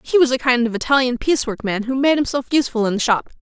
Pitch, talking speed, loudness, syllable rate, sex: 255 Hz, 280 wpm, -18 LUFS, 6.9 syllables/s, female